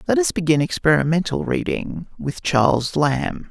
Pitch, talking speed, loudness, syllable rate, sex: 155 Hz, 135 wpm, -20 LUFS, 4.6 syllables/s, male